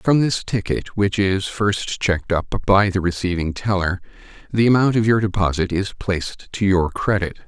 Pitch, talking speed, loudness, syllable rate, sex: 100 Hz, 175 wpm, -20 LUFS, 4.7 syllables/s, male